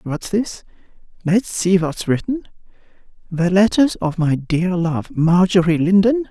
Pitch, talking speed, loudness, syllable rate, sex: 185 Hz, 115 wpm, -18 LUFS, 4.0 syllables/s, male